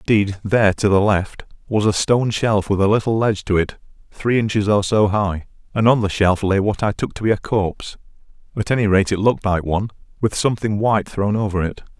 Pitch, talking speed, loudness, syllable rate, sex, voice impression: 105 Hz, 225 wpm, -19 LUFS, 5.9 syllables/s, male, very masculine, very adult-like, slightly old, very thick, very thin, slightly relaxed, powerful, slightly dark, slightly soft, clear, very fluent, slightly raspy, very cool, very intellectual, sincere, calm, very mature, very friendly, very reassuring, very unique, elegant, very wild, sweet, slightly lively, kind, modest